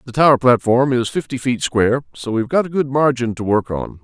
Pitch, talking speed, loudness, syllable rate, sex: 125 Hz, 240 wpm, -17 LUFS, 5.8 syllables/s, male